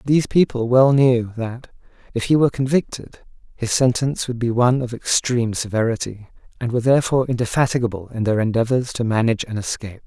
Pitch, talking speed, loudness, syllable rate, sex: 120 Hz, 165 wpm, -19 LUFS, 6.4 syllables/s, male